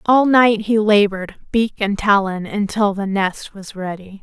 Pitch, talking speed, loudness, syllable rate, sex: 205 Hz, 170 wpm, -17 LUFS, 4.3 syllables/s, female